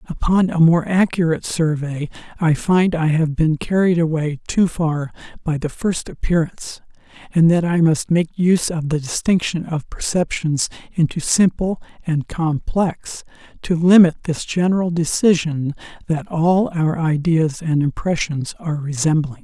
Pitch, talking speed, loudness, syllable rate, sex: 165 Hz, 140 wpm, -18 LUFS, 4.5 syllables/s, male